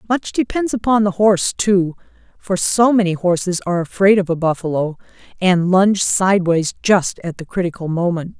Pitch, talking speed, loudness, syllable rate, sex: 185 Hz, 165 wpm, -17 LUFS, 5.2 syllables/s, female